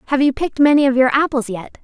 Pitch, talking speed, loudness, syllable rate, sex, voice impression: 270 Hz, 260 wpm, -15 LUFS, 6.9 syllables/s, female, very feminine, very young, very thin, tensed, slightly powerful, very bright, very hard, very clear, very fluent, very cute, intellectual, refreshing, sincere, slightly calm, friendly, reassuring, unique, slightly elegant, slightly wild, sweet, very lively, strict, intense, slightly sharp, slightly light